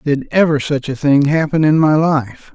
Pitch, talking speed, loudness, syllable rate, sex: 145 Hz, 210 wpm, -14 LUFS, 4.6 syllables/s, male